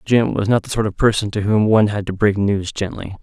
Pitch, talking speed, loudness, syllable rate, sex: 105 Hz, 280 wpm, -18 LUFS, 5.8 syllables/s, male